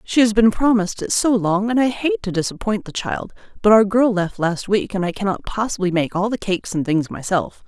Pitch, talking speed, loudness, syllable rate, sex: 200 Hz, 240 wpm, -19 LUFS, 5.5 syllables/s, female